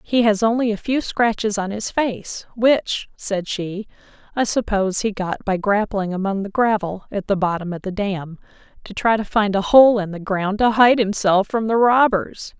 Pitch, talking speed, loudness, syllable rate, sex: 205 Hz, 200 wpm, -19 LUFS, 4.6 syllables/s, female